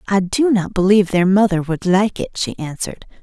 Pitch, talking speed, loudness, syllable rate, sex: 190 Hz, 205 wpm, -17 LUFS, 5.5 syllables/s, female